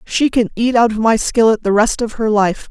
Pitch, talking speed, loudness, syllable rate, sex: 225 Hz, 265 wpm, -15 LUFS, 5.1 syllables/s, female